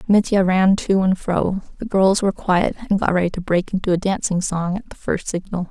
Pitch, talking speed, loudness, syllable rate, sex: 190 Hz, 230 wpm, -19 LUFS, 5.4 syllables/s, female